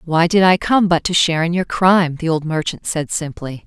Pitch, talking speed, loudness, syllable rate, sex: 170 Hz, 245 wpm, -16 LUFS, 5.4 syllables/s, female